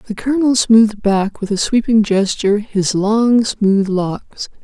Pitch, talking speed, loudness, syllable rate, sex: 215 Hz, 155 wpm, -15 LUFS, 4.2 syllables/s, female